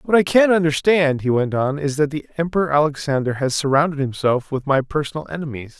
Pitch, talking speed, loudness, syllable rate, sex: 150 Hz, 195 wpm, -19 LUFS, 5.8 syllables/s, male